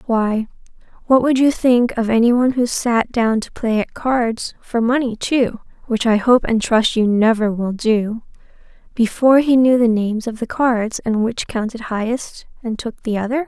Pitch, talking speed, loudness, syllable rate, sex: 230 Hz, 185 wpm, -17 LUFS, 3.8 syllables/s, female